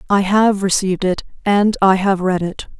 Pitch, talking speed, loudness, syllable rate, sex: 195 Hz, 195 wpm, -16 LUFS, 4.8 syllables/s, female